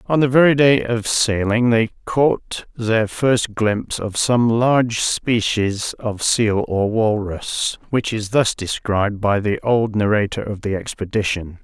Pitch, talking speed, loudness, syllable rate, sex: 110 Hz, 155 wpm, -18 LUFS, 3.9 syllables/s, male